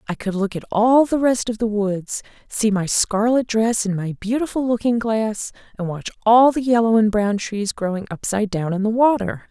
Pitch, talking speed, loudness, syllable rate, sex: 220 Hz, 210 wpm, -19 LUFS, 4.9 syllables/s, female